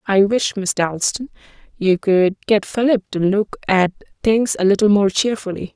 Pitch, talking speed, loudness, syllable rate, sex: 200 Hz, 165 wpm, -18 LUFS, 4.6 syllables/s, female